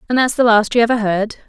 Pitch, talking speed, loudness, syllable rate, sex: 225 Hz, 285 wpm, -15 LUFS, 6.6 syllables/s, female